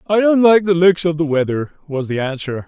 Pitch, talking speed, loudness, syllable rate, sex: 165 Hz, 245 wpm, -16 LUFS, 5.5 syllables/s, male